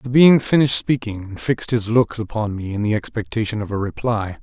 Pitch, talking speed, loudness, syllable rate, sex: 115 Hz, 215 wpm, -19 LUFS, 5.7 syllables/s, male